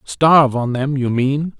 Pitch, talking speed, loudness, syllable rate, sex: 135 Hz, 190 wpm, -16 LUFS, 4.1 syllables/s, male